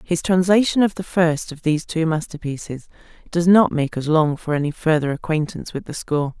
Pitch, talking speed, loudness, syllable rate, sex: 160 Hz, 195 wpm, -20 LUFS, 5.4 syllables/s, female